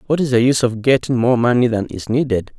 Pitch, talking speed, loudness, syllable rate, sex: 125 Hz, 255 wpm, -16 LUFS, 6.3 syllables/s, male